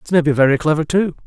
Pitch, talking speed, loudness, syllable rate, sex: 155 Hz, 285 wpm, -16 LUFS, 8.3 syllables/s, male